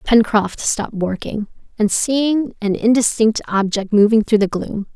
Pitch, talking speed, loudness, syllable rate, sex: 215 Hz, 145 wpm, -17 LUFS, 4.3 syllables/s, female